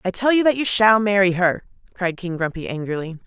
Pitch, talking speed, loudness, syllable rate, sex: 195 Hz, 220 wpm, -19 LUFS, 5.7 syllables/s, female